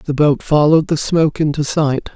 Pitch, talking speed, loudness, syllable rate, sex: 150 Hz, 195 wpm, -15 LUFS, 5.3 syllables/s, female